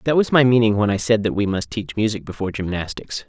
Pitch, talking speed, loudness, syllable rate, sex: 105 Hz, 255 wpm, -20 LUFS, 6.4 syllables/s, male